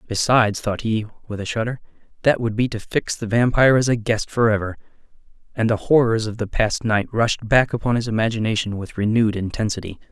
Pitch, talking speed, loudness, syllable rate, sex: 110 Hz, 190 wpm, -20 LUFS, 6.0 syllables/s, male